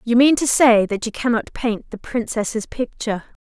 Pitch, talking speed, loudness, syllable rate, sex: 230 Hz, 190 wpm, -19 LUFS, 4.6 syllables/s, female